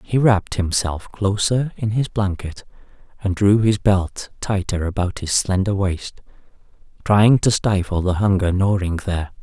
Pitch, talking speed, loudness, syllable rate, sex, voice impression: 100 Hz, 145 wpm, -19 LUFS, 4.4 syllables/s, male, very masculine, adult-like, slightly soft, cool, slightly refreshing, sincere, calm, kind